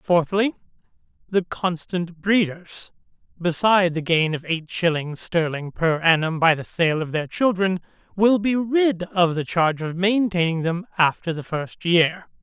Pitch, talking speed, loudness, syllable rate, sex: 175 Hz, 155 wpm, -21 LUFS, 4.3 syllables/s, male